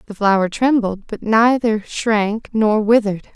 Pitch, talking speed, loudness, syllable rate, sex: 215 Hz, 145 wpm, -17 LUFS, 4.2 syllables/s, female